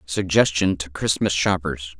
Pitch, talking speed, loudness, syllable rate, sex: 85 Hz, 120 wpm, -21 LUFS, 4.4 syllables/s, male